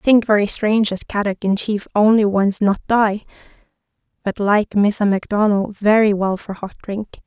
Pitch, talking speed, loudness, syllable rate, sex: 205 Hz, 165 wpm, -18 LUFS, 4.8 syllables/s, female